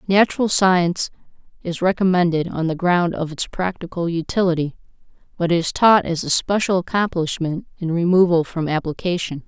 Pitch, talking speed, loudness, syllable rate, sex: 175 Hz, 140 wpm, -19 LUFS, 5.2 syllables/s, female